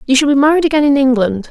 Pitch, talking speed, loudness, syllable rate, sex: 270 Hz, 280 wpm, -12 LUFS, 7.4 syllables/s, female